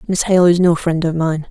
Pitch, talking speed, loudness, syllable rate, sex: 170 Hz, 280 wpm, -15 LUFS, 5.2 syllables/s, female